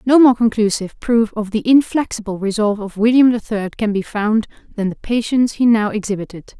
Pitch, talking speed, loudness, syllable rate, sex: 220 Hz, 190 wpm, -17 LUFS, 5.8 syllables/s, female